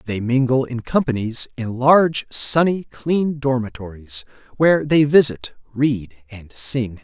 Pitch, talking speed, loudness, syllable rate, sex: 125 Hz, 130 wpm, -18 LUFS, 4.1 syllables/s, male